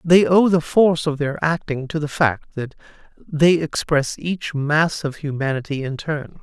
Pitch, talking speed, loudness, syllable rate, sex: 155 Hz, 175 wpm, -20 LUFS, 4.3 syllables/s, male